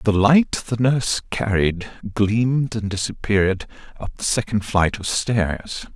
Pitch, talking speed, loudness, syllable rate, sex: 105 Hz, 140 wpm, -21 LUFS, 4.1 syllables/s, male